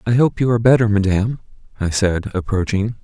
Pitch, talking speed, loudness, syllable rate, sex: 105 Hz, 180 wpm, -18 LUFS, 6.0 syllables/s, male